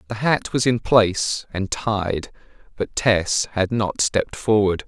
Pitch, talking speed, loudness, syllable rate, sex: 105 Hz, 160 wpm, -21 LUFS, 4.0 syllables/s, male